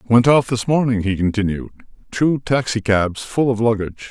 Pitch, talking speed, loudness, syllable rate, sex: 115 Hz, 175 wpm, -18 LUFS, 5.1 syllables/s, male